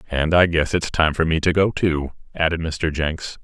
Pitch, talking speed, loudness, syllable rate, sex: 80 Hz, 225 wpm, -20 LUFS, 4.6 syllables/s, male